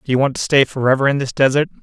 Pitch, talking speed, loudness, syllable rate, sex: 135 Hz, 295 wpm, -16 LUFS, 7.5 syllables/s, male